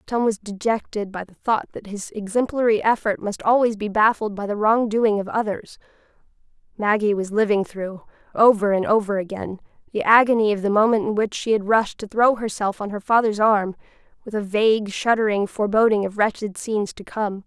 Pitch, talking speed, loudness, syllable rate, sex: 210 Hz, 190 wpm, -21 LUFS, 5.4 syllables/s, female